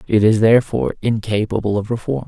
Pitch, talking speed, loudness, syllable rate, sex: 110 Hz, 160 wpm, -17 LUFS, 6.4 syllables/s, male